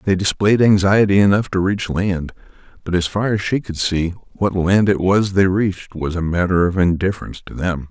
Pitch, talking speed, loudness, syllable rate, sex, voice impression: 95 Hz, 205 wpm, -17 LUFS, 5.3 syllables/s, male, very masculine, very adult-like, slightly old, very thick, relaxed, powerful, dark, slightly soft, slightly muffled, fluent, very cool, intellectual, very sincere, very calm, very mature, very friendly, very reassuring, unique, slightly elegant, wild, slightly sweet, slightly lively, very kind, slightly modest